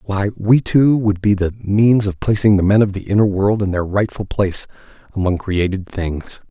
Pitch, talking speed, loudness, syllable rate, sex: 100 Hz, 205 wpm, -17 LUFS, 5.0 syllables/s, male